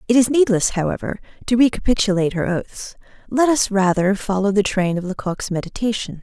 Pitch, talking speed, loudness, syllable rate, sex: 205 Hz, 165 wpm, -19 LUFS, 5.7 syllables/s, female